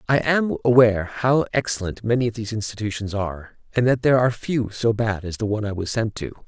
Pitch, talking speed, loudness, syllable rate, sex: 115 Hz, 220 wpm, -22 LUFS, 6.3 syllables/s, male